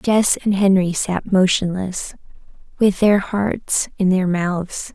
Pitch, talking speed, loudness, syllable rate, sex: 190 Hz, 135 wpm, -18 LUFS, 3.4 syllables/s, female